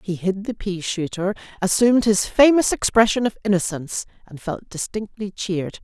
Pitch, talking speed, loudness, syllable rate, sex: 200 Hz, 155 wpm, -21 LUFS, 5.2 syllables/s, female